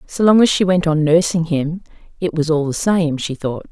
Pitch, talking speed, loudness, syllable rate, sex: 165 Hz, 240 wpm, -17 LUFS, 5.0 syllables/s, female